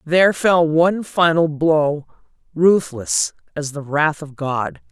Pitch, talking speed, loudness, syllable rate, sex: 160 Hz, 135 wpm, -18 LUFS, 3.7 syllables/s, female